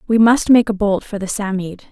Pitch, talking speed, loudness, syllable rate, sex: 210 Hz, 250 wpm, -16 LUFS, 5.3 syllables/s, female